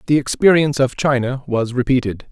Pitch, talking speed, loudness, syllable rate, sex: 130 Hz, 155 wpm, -17 LUFS, 5.7 syllables/s, male